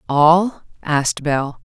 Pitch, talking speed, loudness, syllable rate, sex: 155 Hz, 105 wpm, -17 LUFS, 3.2 syllables/s, female